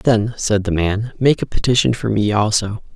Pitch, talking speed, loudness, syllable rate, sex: 110 Hz, 205 wpm, -18 LUFS, 4.8 syllables/s, male